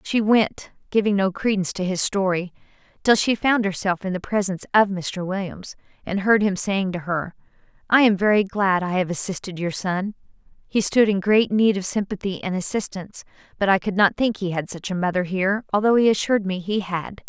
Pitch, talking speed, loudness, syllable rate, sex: 195 Hz, 205 wpm, -21 LUFS, 5.5 syllables/s, female